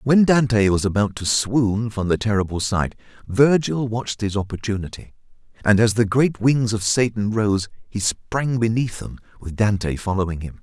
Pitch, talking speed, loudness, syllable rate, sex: 110 Hz, 170 wpm, -20 LUFS, 4.8 syllables/s, male